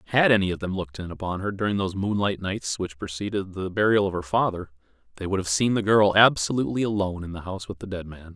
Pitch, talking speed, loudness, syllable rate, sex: 95 Hz, 245 wpm, -24 LUFS, 6.7 syllables/s, male